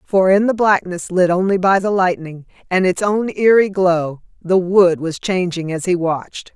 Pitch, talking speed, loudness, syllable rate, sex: 185 Hz, 190 wpm, -16 LUFS, 4.5 syllables/s, female